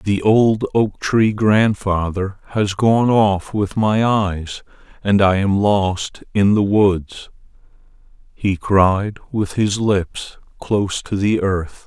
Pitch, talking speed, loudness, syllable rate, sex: 100 Hz, 135 wpm, -17 LUFS, 3.1 syllables/s, male